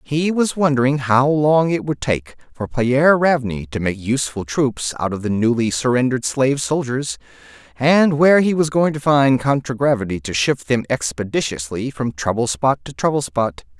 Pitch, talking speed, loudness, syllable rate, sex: 130 Hz, 175 wpm, -18 LUFS, 4.9 syllables/s, male